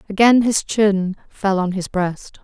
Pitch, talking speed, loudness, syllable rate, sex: 200 Hz, 175 wpm, -18 LUFS, 3.8 syllables/s, female